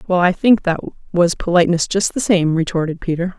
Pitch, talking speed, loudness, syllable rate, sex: 175 Hz, 195 wpm, -17 LUFS, 5.3 syllables/s, female